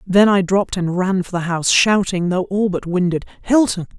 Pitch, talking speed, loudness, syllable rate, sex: 190 Hz, 180 wpm, -17 LUFS, 5.3 syllables/s, female